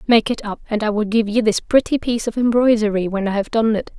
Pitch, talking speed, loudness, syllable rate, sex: 220 Hz, 270 wpm, -18 LUFS, 6.2 syllables/s, female